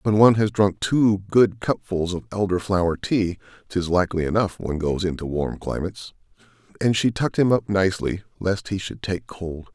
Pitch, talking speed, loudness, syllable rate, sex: 100 Hz, 185 wpm, -22 LUFS, 5.2 syllables/s, male